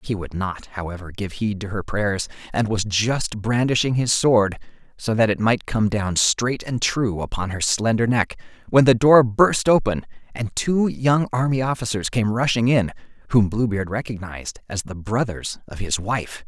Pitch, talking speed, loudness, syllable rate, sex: 110 Hz, 180 wpm, -21 LUFS, 4.6 syllables/s, male